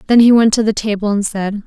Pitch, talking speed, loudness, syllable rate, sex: 215 Hz, 290 wpm, -14 LUFS, 6.1 syllables/s, female